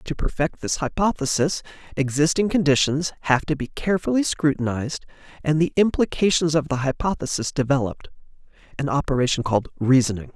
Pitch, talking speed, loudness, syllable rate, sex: 150 Hz, 120 wpm, -22 LUFS, 5.9 syllables/s, male